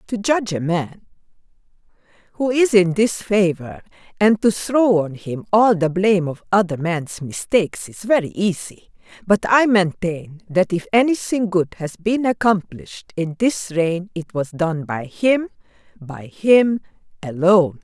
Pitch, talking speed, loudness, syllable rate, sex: 190 Hz, 150 wpm, -19 LUFS, 4.3 syllables/s, female